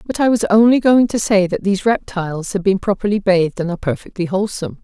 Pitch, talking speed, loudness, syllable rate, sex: 200 Hz, 225 wpm, -16 LUFS, 6.7 syllables/s, female